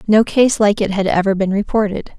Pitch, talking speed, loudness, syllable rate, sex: 205 Hz, 220 wpm, -16 LUFS, 5.5 syllables/s, female